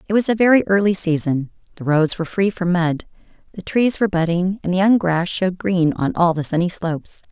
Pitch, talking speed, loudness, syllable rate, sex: 180 Hz, 220 wpm, -18 LUFS, 5.8 syllables/s, female